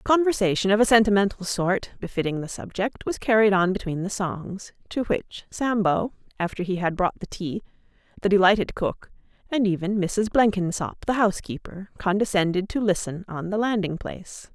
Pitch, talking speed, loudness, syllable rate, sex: 195 Hz, 160 wpm, -24 LUFS, 5.2 syllables/s, female